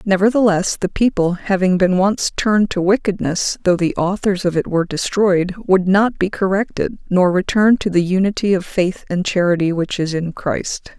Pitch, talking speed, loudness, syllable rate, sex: 190 Hz, 180 wpm, -17 LUFS, 4.9 syllables/s, female